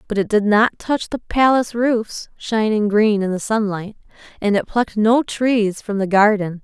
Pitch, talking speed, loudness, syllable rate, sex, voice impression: 215 Hz, 190 wpm, -18 LUFS, 4.6 syllables/s, female, very feminine, very adult-like, thin, tensed, slightly powerful, bright, slightly soft, very clear, slightly fluent, raspy, cool, slightly intellectual, refreshing, sincere, slightly calm, slightly friendly, slightly reassuring, unique, slightly elegant, wild, slightly sweet, lively, kind, slightly modest